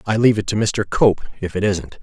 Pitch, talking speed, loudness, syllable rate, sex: 105 Hz, 265 wpm, -19 LUFS, 5.6 syllables/s, male